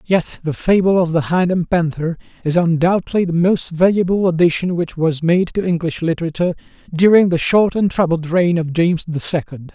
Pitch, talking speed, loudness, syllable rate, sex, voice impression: 170 Hz, 185 wpm, -16 LUFS, 5.4 syllables/s, male, very masculine, old, thick, slightly relaxed, powerful, slightly bright, soft, muffled, slightly fluent, raspy, slightly cool, intellectual, slightly refreshing, sincere, calm, slightly friendly, reassuring, unique, elegant, wild, lively, kind, slightly intense, slightly modest